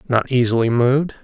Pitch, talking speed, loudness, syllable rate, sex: 125 Hz, 145 wpm, -17 LUFS, 6.1 syllables/s, male